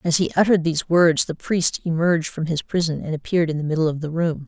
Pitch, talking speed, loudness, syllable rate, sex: 165 Hz, 255 wpm, -21 LUFS, 6.5 syllables/s, female